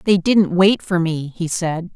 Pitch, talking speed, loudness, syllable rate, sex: 175 Hz, 215 wpm, -18 LUFS, 3.9 syllables/s, female